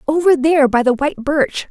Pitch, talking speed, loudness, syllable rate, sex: 285 Hz, 210 wpm, -15 LUFS, 5.8 syllables/s, female